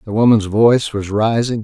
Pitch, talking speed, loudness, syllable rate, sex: 110 Hz, 185 wpm, -15 LUFS, 5.3 syllables/s, male